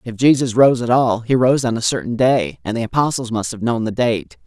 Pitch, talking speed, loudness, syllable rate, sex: 125 Hz, 255 wpm, -17 LUFS, 5.4 syllables/s, female